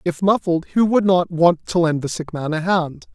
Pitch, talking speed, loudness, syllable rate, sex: 175 Hz, 250 wpm, -19 LUFS, 4.7 syllables/s, male